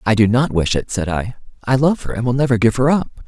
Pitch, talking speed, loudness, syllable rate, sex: 120 Hz, 295 wpm, -17 LUFS, 5.9 syllables/s, male